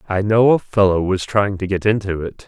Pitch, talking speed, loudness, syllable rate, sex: 100 Hz, 245 wpm, -17 LUFS, 5.2 syllables/s, male